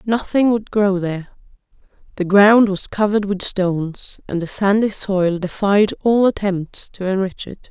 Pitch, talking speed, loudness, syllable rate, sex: 195 Hz, 155 wpm, -18 LUFS, 4.3 syllables/s, female